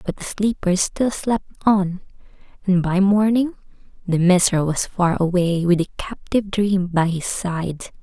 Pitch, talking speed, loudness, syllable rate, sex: 190 Hz, 155 wpm, -20 LUFS, 4.3 syllables/s, female